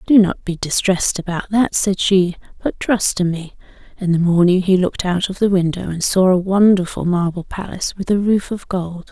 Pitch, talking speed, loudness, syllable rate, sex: 185 Hz, 210 wpm, -17 LUFS, 5.2 syllables/s, female